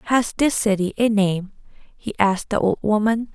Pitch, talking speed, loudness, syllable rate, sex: 215 Hz, 180 wpm, -20 LUFS, 4.7 syllables/s, female